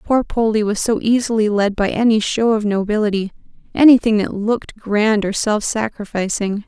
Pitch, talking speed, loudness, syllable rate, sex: 215 Hz, 155 wpm, -17 LUFS, 5.0 syllables/s, female